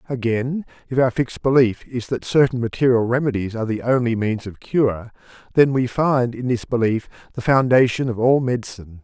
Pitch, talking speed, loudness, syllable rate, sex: 120 Hz, 180 wpm, -20 LUFS, 5.4 syllables/s, male